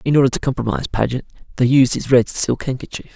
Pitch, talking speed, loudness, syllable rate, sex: 130 Hz, 210 wpm, -18 LUFS, 6.6 syllables/s, male